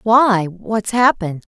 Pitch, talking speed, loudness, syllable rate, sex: 210 Hz, 115 wpm, -16 LUFS, 3.7 syllables/s, female